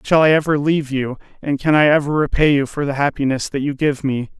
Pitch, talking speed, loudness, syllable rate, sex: 145 Hz, 245 wpm, -17 LUFS, 6.0 syllables/s, male